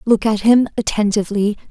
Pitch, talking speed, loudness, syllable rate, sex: 215 Hz, 140 wpm, -16 LUFS, 5.8 syllables/s, female